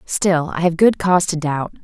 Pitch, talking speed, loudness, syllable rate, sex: 170 Hz, 230 wpm, -17 LUFS, 4.9 syllables/s, female